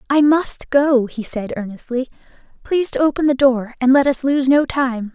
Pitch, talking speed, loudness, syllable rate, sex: 265 Hz, 200 wpm, -17 LUFS, 4.9 syllables/s, female